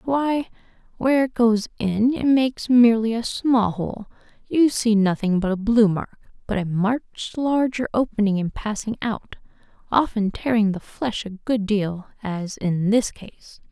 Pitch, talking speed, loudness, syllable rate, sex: 220 Hz, 160 wpm, -22 LUFS, 4.2 syllables/s, female